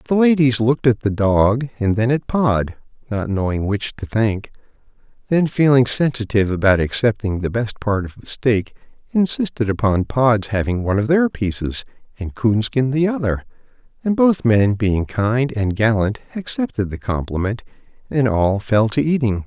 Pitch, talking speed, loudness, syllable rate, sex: 115 Hz, 165 wpm, -18 LUFS, 4.8 syllables/s, male